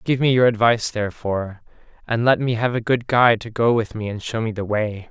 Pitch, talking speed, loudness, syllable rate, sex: 115 Hz, 245 wpm, -20 LUFS, 5.9 syllables/s, male